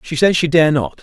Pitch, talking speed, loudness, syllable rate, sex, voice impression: 150 Hz, 295 wpm, -14 LUFS, 6.5 syllables/s, male, masculine, very adult-like, slightly thick, slightly fluent, sincere, calm, reassuring